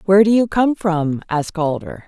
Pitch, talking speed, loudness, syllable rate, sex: 185 Hz, 200 wpm, -17 LUFS, 5.4 syllables/s, female